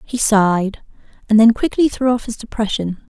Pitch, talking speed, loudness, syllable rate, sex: 220 Hz, 170 wpm, -16 LUFS, 5.1 syllables/s, female